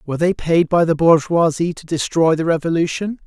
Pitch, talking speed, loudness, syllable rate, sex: 165 Hz, 185 wpm, -17 LUFS, 5.5 syllables/s, male